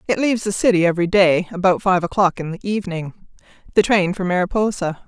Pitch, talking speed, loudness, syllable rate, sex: 185 Hz, 190 wpm, -18 LUFS, 6.4 syllables/s, female